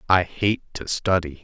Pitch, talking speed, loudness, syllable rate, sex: 90 Hz, 165 wpm, -23 LUFS, 4.4 syllables/s, male